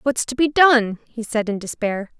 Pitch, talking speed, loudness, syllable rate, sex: 235 Hz, 220 wpm, -19 LUFS, 4.6 syllables/s, female